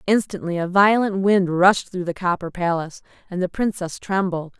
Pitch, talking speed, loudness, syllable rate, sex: 185 Hz, 170 wpm, -20 LUFS, 5.0 syllables/s, female